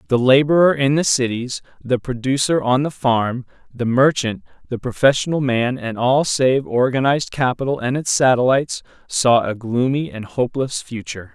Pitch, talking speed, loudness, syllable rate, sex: 130 Hz, 155 wpm, -18 LUFS, 5.0 syllables/s, male